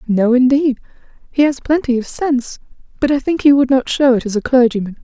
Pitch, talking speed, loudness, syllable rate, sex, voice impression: 260 Hz, 215 wpm, -15 LUFS, 5.9 syllables/s, female, very feminine, young, very thin, relaxed, slightly weak, slightly dark, very soft, slightly muffled, very fluent, slightly raspy, very cute, intellectual, refreshing, very sincere, very calm, very friendly, very reassuring, unique, very elegant, slightly wild, sweet, slightly lively, very kind, very modest, light